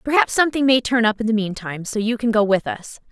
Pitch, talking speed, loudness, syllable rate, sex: 230 Hz, 270 wpm, -19 LUFS, 6.5 syllables/s, female